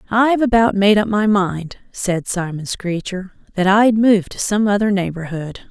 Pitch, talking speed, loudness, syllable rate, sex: 200 Hz, 170 wpm, -17 LUFS, 4.5 syllables/s, female